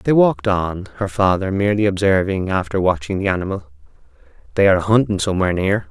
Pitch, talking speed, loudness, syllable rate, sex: 95 Hz, 165 wpm, -18 LUFS, 6.4 syllables/s, male